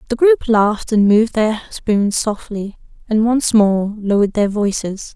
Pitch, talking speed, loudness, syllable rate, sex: 215 Hz, 150 wpm, -16 LUFS, 4.2 syllables/s, female